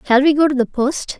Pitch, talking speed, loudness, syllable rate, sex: 275 Hz, 300 wpm, -16 LUFS, 5.8 syllables/s, female